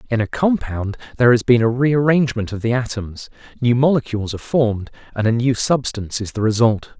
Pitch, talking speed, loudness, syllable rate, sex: 120 Hz, 190 wpm, -18 LUFS, 6.0 syllables/s, male